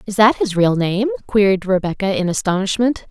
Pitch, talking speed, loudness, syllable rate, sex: 205 Hz, 175 wpm, -17 LUFS, 5.5 syllables/s, female